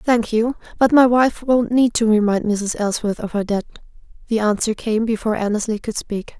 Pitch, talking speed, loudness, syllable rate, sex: 220 Hz, 195 wpm, -19 LUFS, 5.2 syllables/s, female